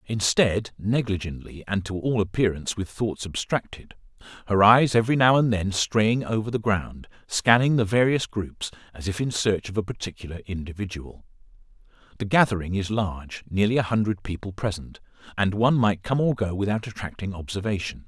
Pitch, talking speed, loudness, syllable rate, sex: 105 Hz, 155 wpm, -24 LUFS, 5.3 syllables/s, male